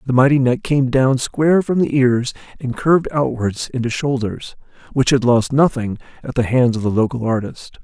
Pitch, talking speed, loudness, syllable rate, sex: 130 Hz, 190 wpm, -17 LUFS, 5.1 syllables/s, male